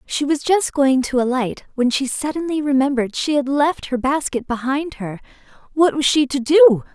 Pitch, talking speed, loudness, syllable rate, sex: 275 Hz, 190 wpm, -18 LUFS, 4.9 syllables/s, female